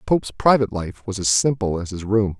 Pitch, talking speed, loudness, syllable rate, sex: 105 Hz, 250 wpm, -20 LUFS, 6.5 syllables/s, male